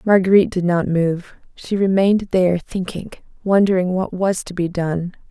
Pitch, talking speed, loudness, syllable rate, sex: 185 Hz, 160 wpm, -18 LUFS, 5.0 syllables/s, female